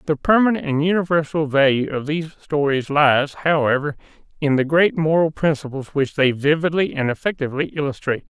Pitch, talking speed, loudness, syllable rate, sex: 150 Hz, 150 wpm, -19 LUFS, 5.6 syllables/s, male